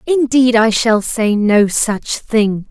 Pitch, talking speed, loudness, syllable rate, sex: 225 Hz, 155 wpm, -14 LUFS, 3.1 syllables/s, female